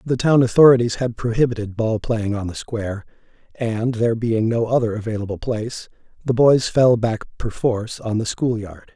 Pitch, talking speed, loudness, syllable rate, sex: 115 Hz, 175 wpm, -20 LUFS, 5.3 syllables/s, male